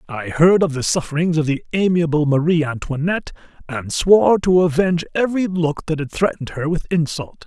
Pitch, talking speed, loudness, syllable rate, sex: 160 Hz, 175 wpm, -18 LUFS, 5.7 syllables/s, male